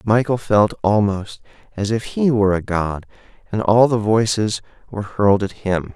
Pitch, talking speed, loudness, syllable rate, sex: 105 Hz, 170 wpm, -18 LUFS, 4.9 syllables/s, male